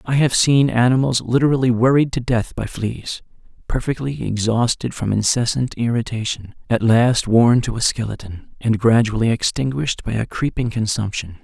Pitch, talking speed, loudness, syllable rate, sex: 120 Hz, 145 wpm, -19 LUFS, 5.0 syllables/s, male